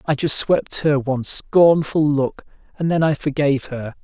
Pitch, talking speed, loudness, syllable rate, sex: 145 Hz, 180 wpm, -18 LUFS, 4.6 syllables/s, male